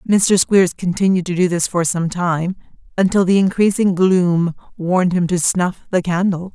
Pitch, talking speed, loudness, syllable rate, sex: 180 Hz, 175 wpm, -17 LUFS, 4.6 syllables/s, female